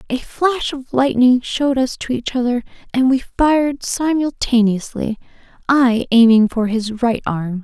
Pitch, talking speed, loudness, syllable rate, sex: 250 Hz, 150 wpm, -17 LUFS, 4.3 syllables/s, female